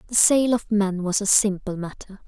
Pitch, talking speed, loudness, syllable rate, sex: 205 Hz, 210 wpm, -20 LUFS, 4.9 syllables/s, female